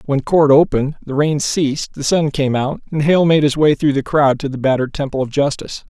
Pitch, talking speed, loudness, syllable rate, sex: 145 Hz, 240 wpm, -16 LUFS, 5.8 syllables/s, male